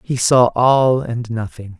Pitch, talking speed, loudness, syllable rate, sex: 120 Hz, 170 wpm, -16 LUFS, 3.6 syllables/s, male